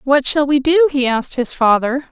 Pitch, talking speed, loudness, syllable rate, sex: 275 Hz, 225 wpm, -15 LUFS, 5.1 syllables/s, female